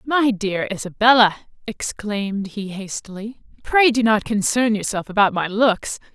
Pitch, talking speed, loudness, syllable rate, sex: 215 Hz, 135 wpm, -19 LUFS, 4.5 syllables/s, female